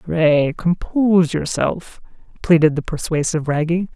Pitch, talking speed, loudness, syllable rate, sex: 165 Hz, 105 wpm, -18 LUFS, 4.5 syllables/s, female